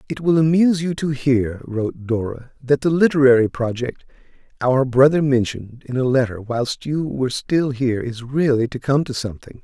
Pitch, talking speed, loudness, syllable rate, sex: 135 Hz, 180 wpm, -19 LUFS, 5.3 syllables/s, male